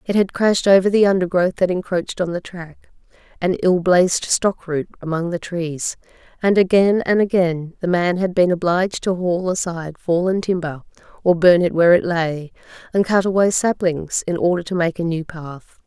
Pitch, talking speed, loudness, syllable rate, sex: 175 Hz, 190 wpm, -18 LUFS, 5.2 syllables/s, female